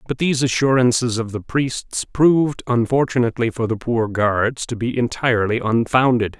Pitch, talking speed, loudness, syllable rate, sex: 120 Hz, 150 wpm, -19 LUFS, 5.0 syllables/s, male